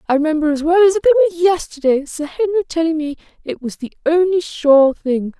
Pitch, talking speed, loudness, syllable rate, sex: 320 Hz, 210 wpm, -16 LUFS, 6.2 syllables/s, female